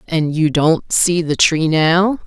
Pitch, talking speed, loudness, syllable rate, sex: 165 Hz, 185 wpm, -15 LUFS, 3.3 syllables/s, female